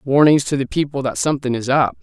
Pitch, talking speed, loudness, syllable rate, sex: 135 Hz, 235 wpm, -18 LUFS, 6.3 syllables/s, male